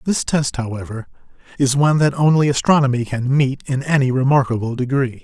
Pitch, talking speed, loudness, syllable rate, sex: 135 Hz, 160 wpm, -17 LUFS, 5.7 syllables/s, male